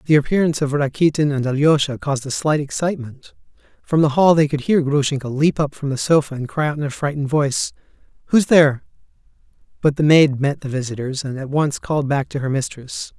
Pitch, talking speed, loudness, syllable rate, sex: 145 Hz, 205 wpm, -19 LUFS, 6.1 syllables/s, male